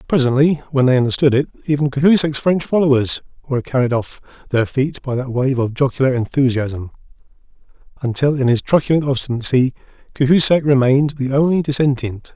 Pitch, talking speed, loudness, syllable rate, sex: 135 Hz, 145 wpm, -17 LUFS, 5.8 syllables/s, male